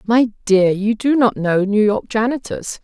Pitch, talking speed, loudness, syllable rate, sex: 220 Hz, 190 wpm, -17 LUFS, 4.3 syllables/s, female